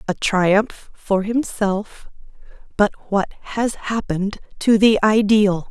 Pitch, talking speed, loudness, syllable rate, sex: 205 Hz, 115 wpm, -19 LUFS, 3.3 syllables/s, female